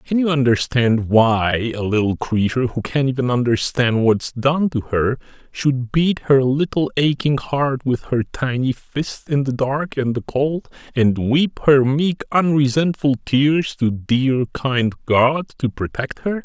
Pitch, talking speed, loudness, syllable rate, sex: 130 Hz, 160 wpm, -19 LUFS, 3.9 syllables/s, male